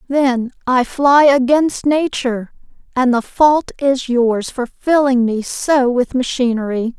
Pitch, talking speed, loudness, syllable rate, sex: 260 Hz, 135 wpm, -15 LUFS, 3.7 syllables/s, female